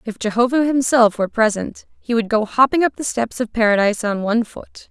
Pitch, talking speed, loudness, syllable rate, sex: 230 Hz, 210 wpm, -18 LUFS, 5.7 syllables/s, female